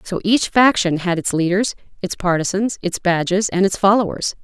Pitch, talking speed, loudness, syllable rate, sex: 190 Hz, 175 wpm, -18 LUFS, 5.1 syllables/s, female